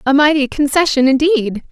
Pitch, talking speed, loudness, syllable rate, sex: 285 Hz, 140 wpm, -13 LUFS, 5.1 syllables/s, female